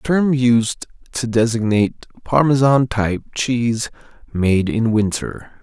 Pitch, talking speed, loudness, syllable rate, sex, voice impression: 120 Hz, 105 wpm, -18 LUFS, 3.9 syllables/s, male, masculine, adult-like, slightly halting, cool, sincere, slightly calm, slightly wild